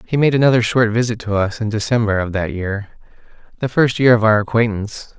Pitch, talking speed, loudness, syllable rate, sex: 110 Hz, 195 wpm, -17 LUFS, 5.9 syllables/s, male